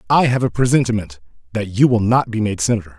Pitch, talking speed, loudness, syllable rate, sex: 110 Hz, 220 wpm, -17 LUFS, 6.5 syllables/s, male